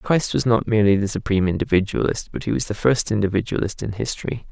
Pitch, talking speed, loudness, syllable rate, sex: 105 Hz, 200 wpm, -21 LUFS, 6.5 syllables/s, male